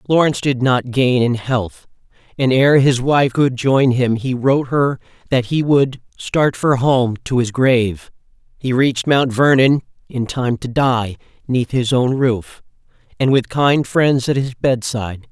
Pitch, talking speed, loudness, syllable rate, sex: 130 Hz, 180 wpm, -16 LUFS, 4.2 syllables/s, male